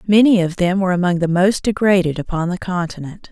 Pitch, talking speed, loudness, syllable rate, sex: 185 Hz, 200 wpm, -17 LUFS, 6.0 syllables/s, female